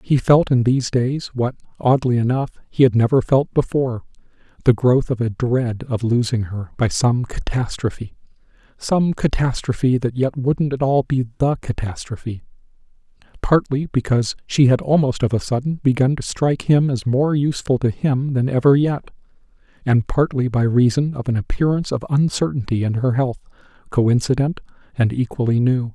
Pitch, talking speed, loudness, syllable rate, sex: 130 Hz, 160 wpm, -19 LUFS, 5.1 syllables/s, male